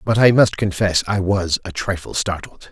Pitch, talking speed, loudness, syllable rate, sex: 95 Hz, 200 wpm, -18 LUFS, 4.8 syllables/s, male